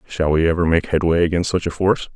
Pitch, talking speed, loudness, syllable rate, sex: 85 Hz, 250 wpm, -18 LUFS, 6.7 syllables/s, male